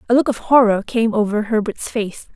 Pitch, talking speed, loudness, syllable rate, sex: 225 Hz, 205 wpm, -18 LUFS, 5.2 syllables/s, female